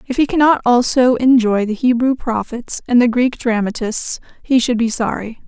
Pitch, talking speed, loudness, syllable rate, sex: 240 Hz, 175 wpm, -16 LUFS, 4.8 syllables/s, female